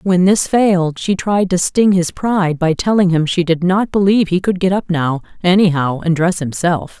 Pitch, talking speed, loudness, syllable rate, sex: 180 Hz, 215 wpm, -15 LUFS, 5.0 syllables/s, female